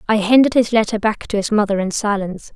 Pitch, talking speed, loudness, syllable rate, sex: 210 Hz, 235 wpm, -17 LUFS, 6.3 syllables/s, female